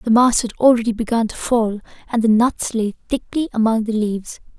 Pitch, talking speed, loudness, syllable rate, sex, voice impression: 225 Hz, 195 wpm, -18 LUFS, 5.6 syllables/s, female, feminine, slightly young, relaxed, slightly weak, soft, raspy, calm, friendly, lively, kind, modest